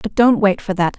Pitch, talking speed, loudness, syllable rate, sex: 205 Hz, 305 wpm, -16 LUFS, 5.3 syllables/s, female